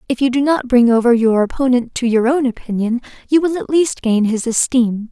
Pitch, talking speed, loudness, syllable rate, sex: 245 Hz, 225 wpm, -16 LUFS, 5.4 syllables/s, female